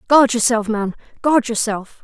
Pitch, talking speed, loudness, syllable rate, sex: 230 Hz, 120 wpm, -18 LUFS, 4.4 syllables/s, female